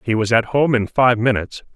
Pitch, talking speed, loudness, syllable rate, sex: 120 Hz, 240 wpm, -17 LUFS, 5.7 syllables/s, male